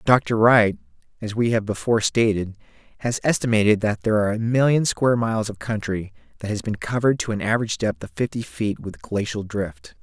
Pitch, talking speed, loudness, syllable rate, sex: 110 Hz, 180 wpm, -22 LUFS, 5.9 syllables/s, male